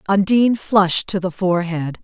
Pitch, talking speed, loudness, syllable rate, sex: 190 Hz, 145 wpm, -17 LUFS, 5.5 syllables/s, female